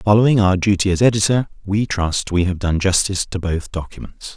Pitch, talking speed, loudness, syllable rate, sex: 95 Hz, 195 wpm, -18 LUFS, 5.6 syllables/s, male